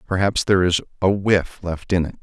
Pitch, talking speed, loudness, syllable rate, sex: 90 Hz, 215 wpm, -20 LUFS, 5.6 syllables/s, male